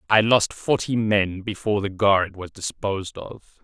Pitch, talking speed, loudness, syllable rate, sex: 100 Hz, 165 wpm, -22 LUFS, 4.4 syllables/s, male